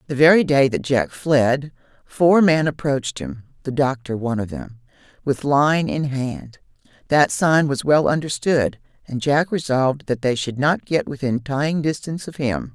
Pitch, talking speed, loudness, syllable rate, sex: 140 Hz, 175 wpm, -20 LUFS, 4.2 syllables/s, female